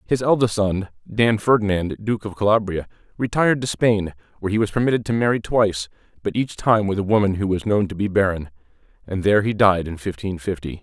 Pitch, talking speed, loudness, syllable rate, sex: 105 Hz, 205 wpm, -21 LUFS, 5.9 syllables/s, male